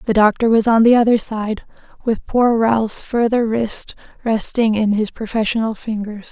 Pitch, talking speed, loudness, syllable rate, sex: 220 Hz, 160 wpm, -17 LUFS, 4.6 syllables/s, female